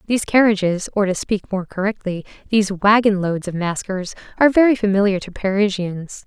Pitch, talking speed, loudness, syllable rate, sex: 200 Hz, 165 wpm, -18 LUFS, 5.6 syllables/s, female